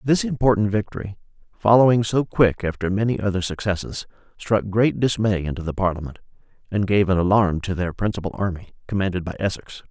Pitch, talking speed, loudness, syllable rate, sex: 100 Hz, 165 wpm, -21 LUFS, 5.9 syllables/s, male